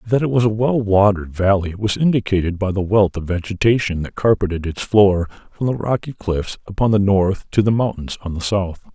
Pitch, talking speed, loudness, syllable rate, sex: 100 Hz, 210 wpm, -18 LUFS, 5.4 syllables/s, male